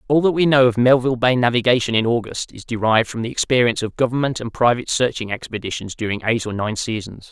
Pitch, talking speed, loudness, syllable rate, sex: 120 Hz, 215 wpm, -19 LUFS, 6.6 syllables/s, male